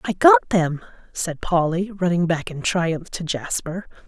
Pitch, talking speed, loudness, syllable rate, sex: 175 Hz, 160 wpm, -21 LUFS, 4.2 syllables/s, female